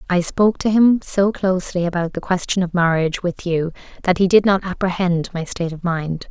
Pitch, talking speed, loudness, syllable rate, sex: 180 Hz, 210 wpm, -19 LUFS, 5.6 syllables/s, female